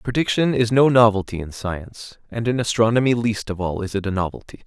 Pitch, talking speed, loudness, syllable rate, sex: 110 Hz, 205 wpm, -20 LUFS, 5.8 syllables/s, male